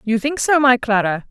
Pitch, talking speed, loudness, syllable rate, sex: 245 Hz, 230 wpm, -16 LUFS, 5.0 syllables/s, female